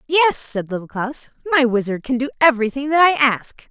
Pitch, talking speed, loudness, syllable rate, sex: 260 Hz, 195 wpm, -18 LUFS, 5.2 syllables/s, female